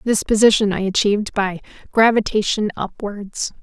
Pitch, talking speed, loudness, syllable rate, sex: 205 Hz, 115 wpm, -18 LUFS, 4.9 syllables/s, female